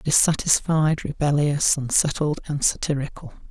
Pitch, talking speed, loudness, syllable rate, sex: 145 Hz, 85 wpm, -21 LUFS, 4.6 syllables/s, male